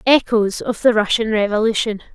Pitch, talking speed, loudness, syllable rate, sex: 220 Hz, 140 wpm, -17 LUFS, 5.2 syllables/s, female